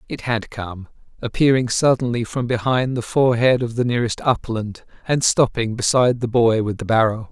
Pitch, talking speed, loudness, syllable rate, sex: 120 Hz, 165 wpm, -19 LUFS, 5.3 syllables/s, male